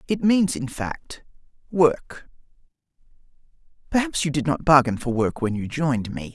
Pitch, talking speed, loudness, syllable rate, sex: 145 Hz, 150 wpm, -22 LUFS, 4.6 syllables/s, male